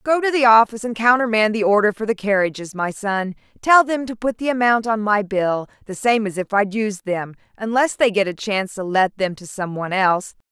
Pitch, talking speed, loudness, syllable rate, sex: 215 Hz, 235 wpm, -19 LUFS, 5.5 syllables/s, female